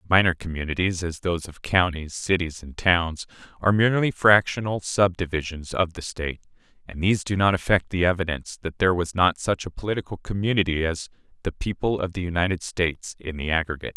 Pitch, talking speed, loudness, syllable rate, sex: 90 Hz, 170 wpm, -24 LUFS, 6.1 syllables/s, male